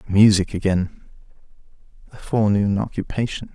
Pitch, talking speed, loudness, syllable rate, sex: 100 Hz, 85 wpm, -20 LUFS, 5.3 syllables/s, male